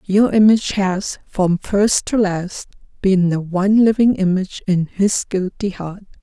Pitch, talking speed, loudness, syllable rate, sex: 195 Hz, 155 wpm, -17 LUFS, 4.3 syllables/s, female